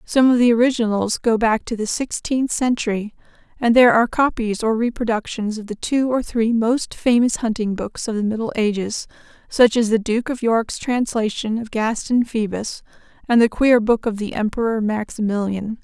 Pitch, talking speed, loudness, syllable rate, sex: 225 Hz, 180 wpm, -19 LUFS, 5.0 syllables/s, female